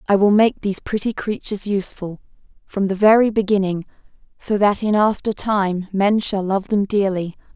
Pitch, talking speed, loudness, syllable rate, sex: 200 Hz, 165 wpm, -19 LUFS, 5.2 syllables/s, female